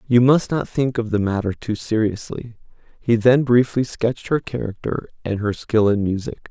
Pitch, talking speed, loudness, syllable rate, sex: 115 Hz, 185 wpm, -20 LUFS, 4.8 syllables/s, male